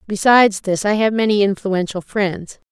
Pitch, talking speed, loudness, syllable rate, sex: 200 Hz, 155 wpm, -17 LUFS, 4.9 syllables/s, female